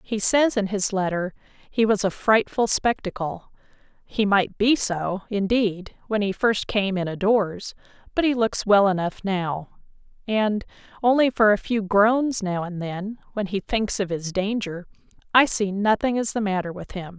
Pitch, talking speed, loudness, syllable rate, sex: 205 Hz, 180 wpm, -23 LUFS, 4.3 syllables/s, female